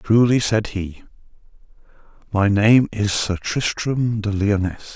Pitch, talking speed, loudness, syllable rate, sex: 105 Hz, 120 wpm, -19 LUFS, 3.6 syllables/s, male